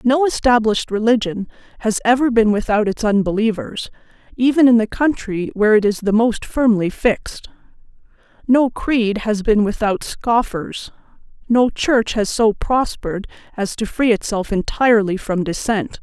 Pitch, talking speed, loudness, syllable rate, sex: 225 Hz, 140 wpm, -17 LUFS, 4.7 syllables/s, female